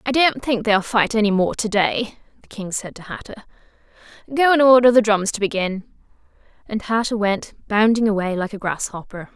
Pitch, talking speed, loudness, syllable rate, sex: 215 Hz, 185 wpm, -19 LUFS, 5.1 syllables/s, female